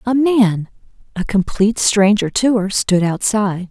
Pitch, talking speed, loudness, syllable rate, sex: 205 Hz, 115 wpm, -15 LUFS, 4.5 syllables/s, female